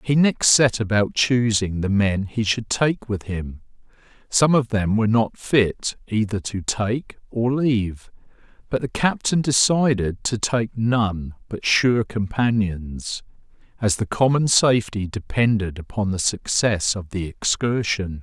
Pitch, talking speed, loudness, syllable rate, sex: 110 Hz, 145 wpm, -21 LUFS, 3.9 syllables/s, male